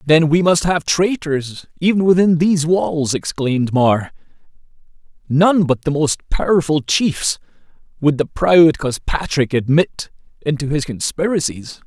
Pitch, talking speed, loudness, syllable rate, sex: 155 Hz, 125 wpm, -16 LUFS, 4.2 syllables/s, male